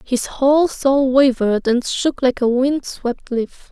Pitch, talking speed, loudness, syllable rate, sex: 260 Hz, 180 wpm, -17 LUFS, 3.9 syllables/s, female